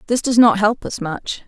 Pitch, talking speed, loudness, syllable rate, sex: 220 Hz, 245 wpm, -17 LUFS, 4.8 syllables/s, female